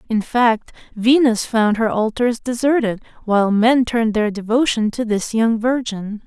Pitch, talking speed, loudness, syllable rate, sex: 225 Hz, 155 wpm, -18 LUFS, 4.5 syllables/s, female